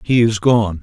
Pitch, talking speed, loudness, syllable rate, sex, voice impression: 110 Hz, 215 wpm, -15 LUFS, 4.1 syllables/s, male, masculine, middle-aged, tensed, slightly weak, slightly dark, slightly soft, slightly muffled, halting, cool, calm, mature, reassuring, wild, kind, modest